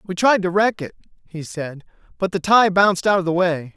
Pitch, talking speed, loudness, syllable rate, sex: 185 Hz, 240 wpm, -18 LUFS, 5.3 syllables/s, male